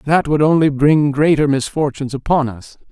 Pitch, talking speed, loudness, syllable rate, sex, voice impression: 145 Hz, 165 wpm, -15 LUFS, 5.1 syllables/s, male, masculine, very adult-like, sincere, elegant, slightly wild